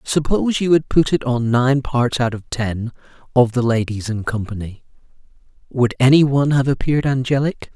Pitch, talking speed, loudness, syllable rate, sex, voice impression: 130 Hz, 170 wpm, -18 LUFS, 5.2 syllables/s, male, masculine, adult-like, slightly tensed, slightly weak, hard, slightly muffled, intellectual, calm, mature, slightly friendly, wild, slightly kind, slightly modest